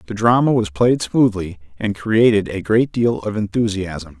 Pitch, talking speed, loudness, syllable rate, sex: 105 Hz, 170 wpm, -18 LUFS, 4.4 syllables/s, male